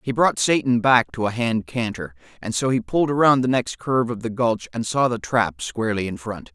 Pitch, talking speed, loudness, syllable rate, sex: 115 Hz, 240 wpm, -21 LUFS, 5.4 syllables/s, male